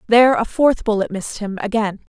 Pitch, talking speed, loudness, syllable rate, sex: 220 Hz, 195 wpm, -18 LUFS, 6.0 syllables/s, female